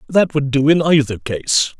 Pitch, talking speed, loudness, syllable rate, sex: 140 Hz, 200 wpm, -16 LUFS, 4.4 syllables/s, male